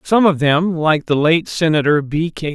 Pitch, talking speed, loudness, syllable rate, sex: 160 Hz, 210 wpm, -16 LUFS, 4.4 syllables/s, male